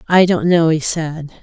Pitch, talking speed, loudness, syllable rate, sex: 160 Hz, 210 wpm, -15 LUFS, 4.4 syllables/s, female